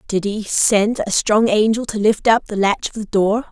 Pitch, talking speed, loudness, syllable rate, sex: 210 Hz, 240 wpm, -17 LUFS, 4.6 syllables/s, female